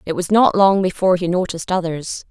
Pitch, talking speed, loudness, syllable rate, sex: 180 Hz, 210 wpm, -17 LUFS, 6.0 syllables/s, female